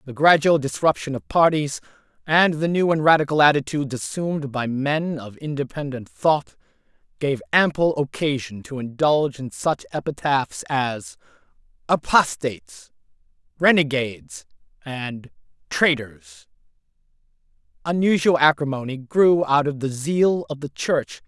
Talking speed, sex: 120 wpm, male